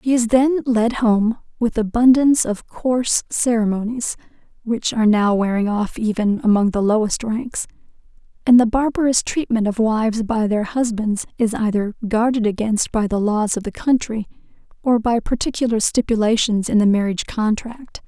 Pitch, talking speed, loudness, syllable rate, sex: 225 Hz, 155 wpm, -18 LUFS, 5.0 syllables/s, female